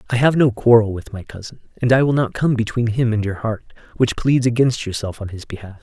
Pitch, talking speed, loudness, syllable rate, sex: 115 Hz, 235 wpm, -18 LUFS, 5.9 syllables/s, male